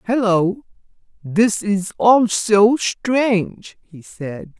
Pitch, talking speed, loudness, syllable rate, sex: 205 Hz, 90 wpm, -17 LUFS, 2.7 syllables/s, female